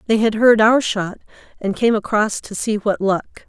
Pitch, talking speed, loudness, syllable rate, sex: 215 Hz, 205 wpm, -18 LUFS, 4.9 syllables/s, female